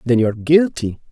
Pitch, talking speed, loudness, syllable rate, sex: 130 Hz, 215 wpm, -17 LUFS, 6.5 syllables/s, male